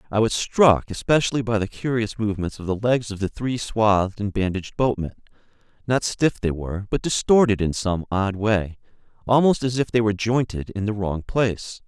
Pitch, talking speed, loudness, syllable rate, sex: 110 Hz, 185 wpm, -22 LUFS, 5.4 syllables/s, male